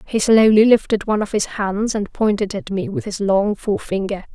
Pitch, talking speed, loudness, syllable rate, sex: 205 Hz, 205 wpm, -18 LUFS, 5.4 syllables/s, female